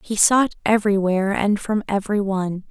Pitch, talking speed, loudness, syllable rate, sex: 205 Hz, 155 wpm, -20 LUFS, 5.9 syllables/s, female